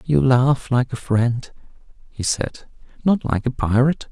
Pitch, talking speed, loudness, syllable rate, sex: 125 Hz, 145 wpm, -20 LUFS, 4.3 syllables/s, male